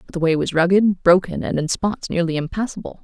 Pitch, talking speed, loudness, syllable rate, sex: 180 Hz, 215 wpm, -19 LUFS, 5.9 syllables/s, female